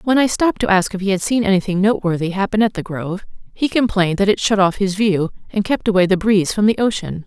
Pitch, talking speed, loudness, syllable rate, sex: 200 Hz, 255 wpm, -17 LUFS, 6.5 syllables/s, female